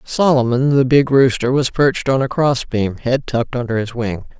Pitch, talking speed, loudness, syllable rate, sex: 125 Hz, 190 wpm, -16 LUFS, 5.0 syllables/s, female